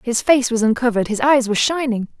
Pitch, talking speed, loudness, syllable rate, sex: 245 Hz, 220 wpm, -17 LUFS, 6.4 syllables/s, female